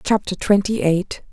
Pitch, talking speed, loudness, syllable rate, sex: 195 Hz, 135 wpm, -19 LUFS, 4.2 syllables/s, female